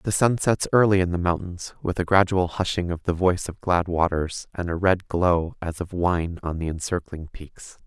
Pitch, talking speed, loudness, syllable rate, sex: 90 Hz, 215 wpm, -23 LUFS, 4.8 syllables/s, male